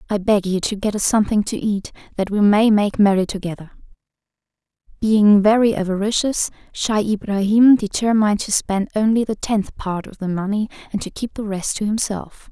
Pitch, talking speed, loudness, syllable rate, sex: 205 Hz, 175 wpm, -19 LUFS, 5.3 syllables/s, female